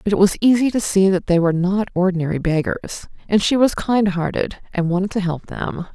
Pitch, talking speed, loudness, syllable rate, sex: 190 Hz, 220 wpm, -19 LUFS, 5.6 syllables/s, female